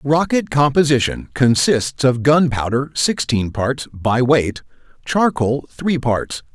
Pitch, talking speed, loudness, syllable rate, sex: 135 Hz, 110 wpm, -17 LUFS, 3.6 syllables/s, male